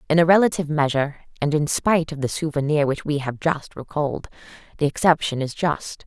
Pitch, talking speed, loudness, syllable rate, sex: 150 Hz, 190 wpm, -22 LUFS, 6.1 syllables/s, female